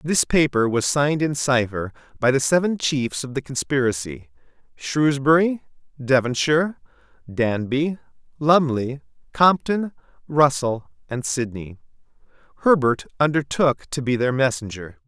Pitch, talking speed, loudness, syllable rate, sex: 135 Hz, 105 wpm, -21 LUFS, 4.4 syllables/s, male